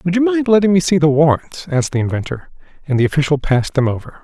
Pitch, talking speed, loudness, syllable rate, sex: 160 Hz, 240 wpm, -16 LUFS, 7.0 syllables/s, male